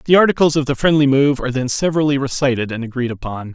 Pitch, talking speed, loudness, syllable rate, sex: 135 Hz, 220 wpm, -17 LUFS, 7.0 syllables/s, male